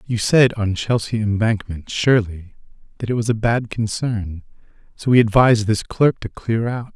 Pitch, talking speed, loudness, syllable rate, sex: 110 Hz, 175 wpm, -19 LUFS, 4.8 syllables/s, male